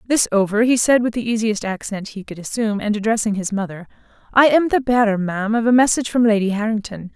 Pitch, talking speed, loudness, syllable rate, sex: 220 Hz, 220 wpm, -18 LUFS, 6.3 syllables/s, female